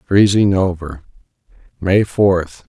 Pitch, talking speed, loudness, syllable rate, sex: 90 Hz, 85 wpm, -15 LUFS, 3.5 syllables/s, male